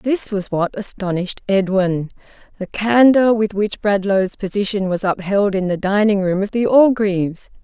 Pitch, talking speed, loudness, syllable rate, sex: 200 Hz, 155 wpm, -17 LUFS, 4.6 syllables/s, female